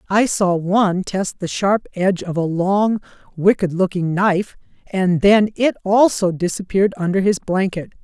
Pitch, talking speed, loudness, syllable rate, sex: 190 Hz, 155 wpm, -18 LUFS, 4.7 syllables/s, female